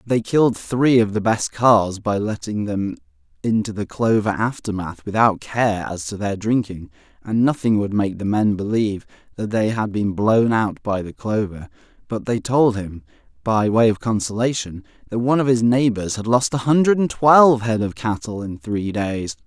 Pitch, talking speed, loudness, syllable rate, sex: 110 Hz, 190 wpm, -20 LUFS, 4.8 syllables/s, male